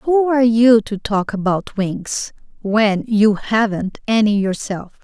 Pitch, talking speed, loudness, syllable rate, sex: 215 Hz, 130 wpm, -17 LUFS, 3.7 syllables/s, female